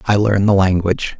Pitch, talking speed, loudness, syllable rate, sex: 100 Hz, 200 wpm, -15 LUFS, 5.8 syllables/s, male